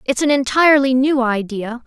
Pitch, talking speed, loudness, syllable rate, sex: 260 Hz, 160 wpm, -16 LUFS, 5.1 syllables/s, female